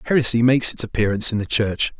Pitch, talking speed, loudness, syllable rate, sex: 115 Hz, 210 wpm, -18 LUFS, 7.3 syllables/s, male